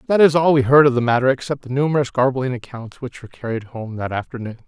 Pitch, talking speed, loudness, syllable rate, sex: 130 Hz, 245 wpm, -18 LUFS, 6.6 syllables/s, male